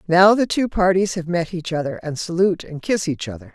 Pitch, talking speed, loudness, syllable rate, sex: 175 Hz, 235 wpm, -20 LUFS, 5.6 syllables/s, female